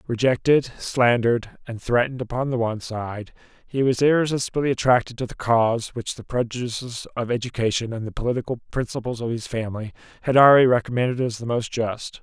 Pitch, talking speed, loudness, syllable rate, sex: 120 Hz, 165 wpm, -22 LUFS, 6.1 syllables/s, male